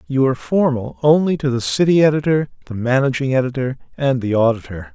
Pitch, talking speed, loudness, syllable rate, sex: 130 Hz, 170 wpm, -17 LUFS, 5.9 syllables/s, male